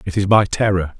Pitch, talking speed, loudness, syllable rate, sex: 95 Hz, 240 wpm, -16 LUFS, 5.8 syllables/s, male